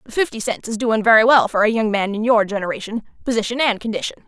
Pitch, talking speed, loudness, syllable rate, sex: 220 Hz, 240 wpm, -18 LUFS, 6.6 syllables/s, female